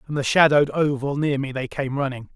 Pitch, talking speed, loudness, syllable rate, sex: 140 Hz, 230 wpm, -21 LUFS, 5.9 syllables/s, male